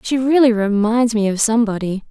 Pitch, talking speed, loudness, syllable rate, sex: 225 Hz, 170 wpm, -16 LUFS, 5.6 syllables/s, female